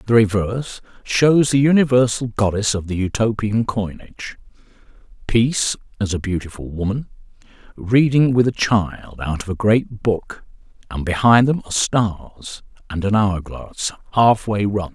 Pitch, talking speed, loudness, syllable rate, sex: 110 Hz, 135 wpm, -19 LUFS, 4.4 syllables/s, male